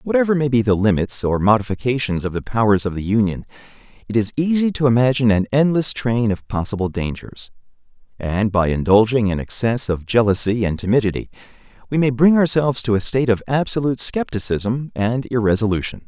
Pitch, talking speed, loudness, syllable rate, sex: 115 Hz, 170 wpm, -18 LUFS, 5.9 syllables/s, male